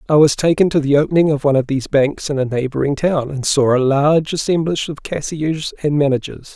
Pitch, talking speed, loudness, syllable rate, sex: 145 Hz, 220 wpm, -16 LUFS, 6.1 syllables/s, male